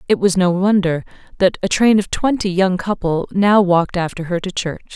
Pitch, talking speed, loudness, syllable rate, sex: 185 Hz, 205 wpm, -17 LUFS, 5.2 syllables/s, female